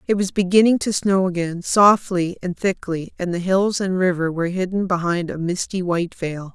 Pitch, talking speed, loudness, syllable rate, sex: 180 Hz, 190 wpm, -20 LUFS, 5.1 syllables/s, female